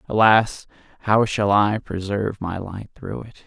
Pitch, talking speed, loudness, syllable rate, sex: 105 Hz, 155 wpm, -21 LUFS, 4.1 syllables/s, male